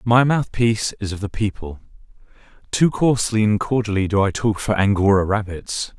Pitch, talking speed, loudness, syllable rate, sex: 105 Hz, 150 wpm, -19 LUFS, 5.3 syllables/s, male